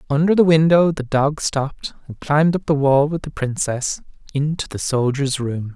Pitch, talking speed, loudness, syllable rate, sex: 145 Hz, 190 wpm, -19 LUFS, 4.9 syllables/s, male